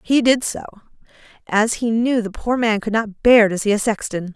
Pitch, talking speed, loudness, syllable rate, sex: 220 Hz, 220 wpm, -18 LUFS, 5.0 syllables/s, female